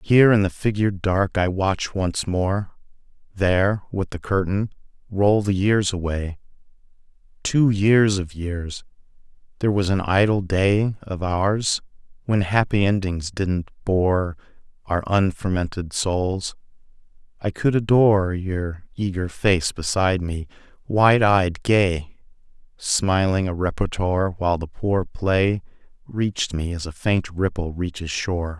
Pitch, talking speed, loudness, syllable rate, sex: 95 Hz, 130 wpm, -22 LUFS, 4.0 syllables/s, male